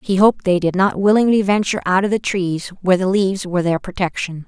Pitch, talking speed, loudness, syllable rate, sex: 190 Hz, 230 wpm, -17 LUFS, 6.4 syllables/s, female